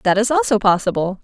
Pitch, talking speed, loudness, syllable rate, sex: 200 Hz, 195 wpm, -17 LUFS, 5.9 syllables/s, female